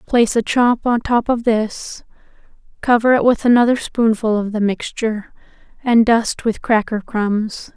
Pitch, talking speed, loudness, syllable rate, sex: 225 Hz, 155 wpm, -17 LUFS, 4.4 syllables/s, female